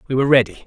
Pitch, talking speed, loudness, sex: 130 Hz, 270 wpm, -16 LUFS, male